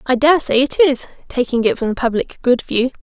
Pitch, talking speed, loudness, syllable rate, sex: 260 Hz, 220 wpm, -16 LUFS, 5.8 syllables/s, female